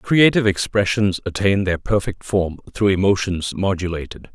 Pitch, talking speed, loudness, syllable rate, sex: 95 Hz, 125 wpm, -19 LUFS, 4.9 syllables/s, male